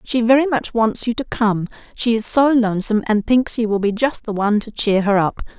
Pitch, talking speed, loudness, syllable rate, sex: 225 Hz, 235 wpm, -18 LUFS, 5.6 syllables/s, female